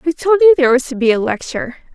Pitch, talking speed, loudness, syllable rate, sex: 285 Hz, 280 wpm, -14 LUFS, 7.1 syllables/s, female